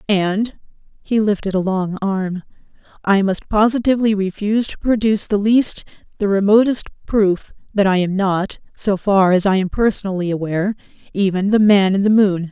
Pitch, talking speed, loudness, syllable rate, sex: 200 Hz, 155 wpm, -17 LUFS, 5.2 syllables/s, female